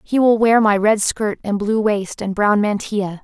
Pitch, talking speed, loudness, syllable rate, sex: 210 Hz, 220 wpm, -17 LUFS, 4.6 syllables/s, female